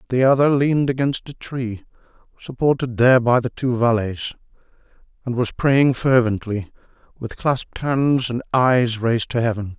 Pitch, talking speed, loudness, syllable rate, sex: 125 Hz, 145 wpm, -19 LUFS, 4.8 syllables/s, male